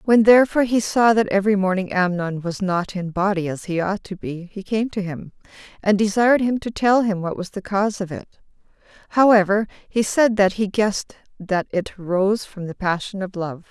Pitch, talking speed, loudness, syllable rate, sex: 200 Hz, 205 wpm, -20 LUFS, 5.5 syllables/s, female